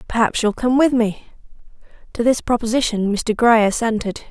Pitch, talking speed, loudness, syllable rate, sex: 230 Hz, 155 wpm, -18 LUFS, 5.1 syllables/s, female